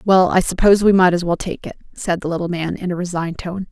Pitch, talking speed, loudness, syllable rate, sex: 180 Hz, 275 wpm, -18 LUFS, 6.4 syllables/s, female